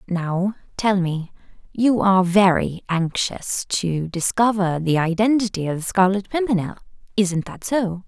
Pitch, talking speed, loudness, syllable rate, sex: 190 Hz, 135 wpm, -20 LUFS, 4.3 syllables/s, female